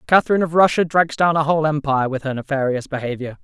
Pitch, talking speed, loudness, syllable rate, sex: 150 Hz, 210 wpm, -19 LUFS, 7.0 syllables/s, male